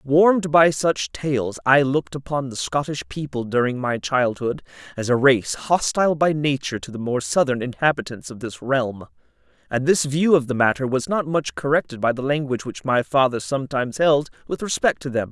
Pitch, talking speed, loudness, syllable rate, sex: 135 Hz, 190 wpm, -21 LUFS, 5.3 syllables/s, male